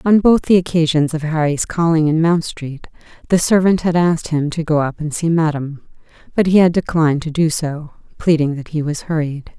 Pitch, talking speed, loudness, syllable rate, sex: 160 Hz, 205 wpm, -16 LUFS, 5.4 syllables/s, female